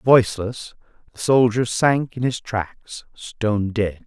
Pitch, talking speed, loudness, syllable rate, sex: 115 Hz, 120 wpm, -21 LUFS, 3.6 syllables/s, male